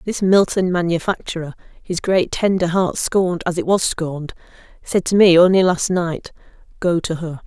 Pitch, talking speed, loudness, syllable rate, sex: 175 Hz, 170 wpm, -18 LUFS, 5.0 syllables/s, female